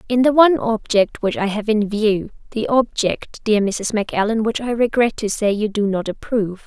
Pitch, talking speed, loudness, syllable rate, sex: 215 Hz, 200 wpm, -19 LUFS, 5.0 syllables/s, female